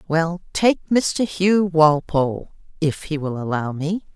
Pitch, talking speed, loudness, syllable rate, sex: 165 Hz, 145 wpm, -20 LUFS, 2.9 syllables/s, female